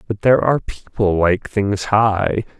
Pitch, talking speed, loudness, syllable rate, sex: 105 Hz, 160 wpm, -17 LUFS, 4.3 syllables/s, male